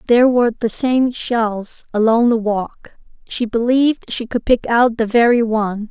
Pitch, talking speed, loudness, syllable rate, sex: 230 Hz, 175 wpm, -16 LUFS, 4.5 syllables/s, female